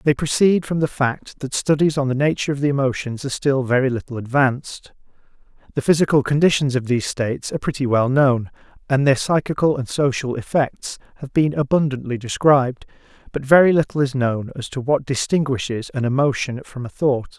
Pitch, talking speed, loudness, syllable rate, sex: 135 Hz, 180 wpm, -19 LUFS, 5.7 syllables/s, male